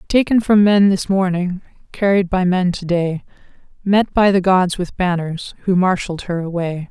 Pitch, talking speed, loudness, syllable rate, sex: 185 Hz, 175 wpm, -17 LUFS, 4.7 syllables/s, female